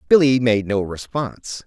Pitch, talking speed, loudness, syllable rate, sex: 120 Hz, 145 wpm, -19 LUFS, 4.8 syllables/s, male